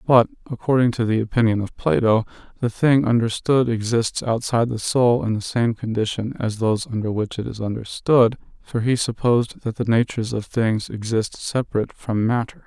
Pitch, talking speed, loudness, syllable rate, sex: 115 Hz, 175 wpm, -21 LUFS, 5.4 syllables/s, male